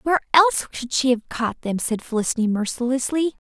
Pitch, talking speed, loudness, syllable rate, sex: 260 Hz, 170 wpm, -21 LUFS, 6.0 syllables/s, female